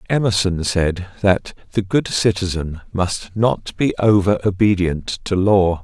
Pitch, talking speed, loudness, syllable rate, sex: 95 Hz, 135 wpm, -18 LUFS, 4.0 syllables/s, male